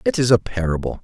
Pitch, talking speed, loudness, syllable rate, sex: 100 Hz, 230 wpm, -19 LUFS, 6.5 syllables/s, male